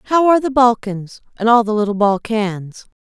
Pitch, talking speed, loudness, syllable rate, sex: 225 Hz, 180 wpm, -16 LUFS, 5.2 syllables/s, female